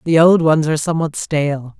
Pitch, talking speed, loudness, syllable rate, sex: 155 Hz, 200 wpm, -15 LUFS, 6.0 syllables/s, female